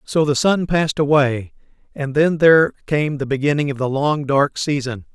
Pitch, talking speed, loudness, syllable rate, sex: 145 Hz, 185 wpm, -18 LUFS, 5.0 syllables/s, male